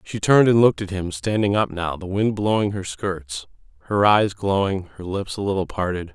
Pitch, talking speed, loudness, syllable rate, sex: 95 Hz, 215 wpm, -21 LUFS, 5.3 syllables/s, male